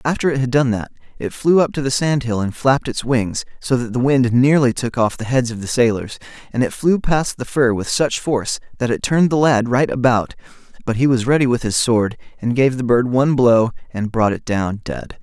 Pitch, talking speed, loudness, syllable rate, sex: 125 Hz, 240 wpm, -18 LUFS, 5.4 syllables/s, male